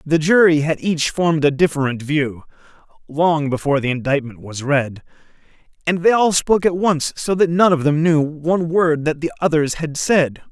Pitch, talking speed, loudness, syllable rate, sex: 155 Hz, 190 wpm, -17 LUFS, 4.2 syllables/s, male